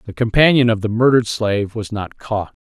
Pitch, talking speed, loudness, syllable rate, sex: 110 Hz, 205 wpm, -17 LUFS, 5.8 syllables/s, male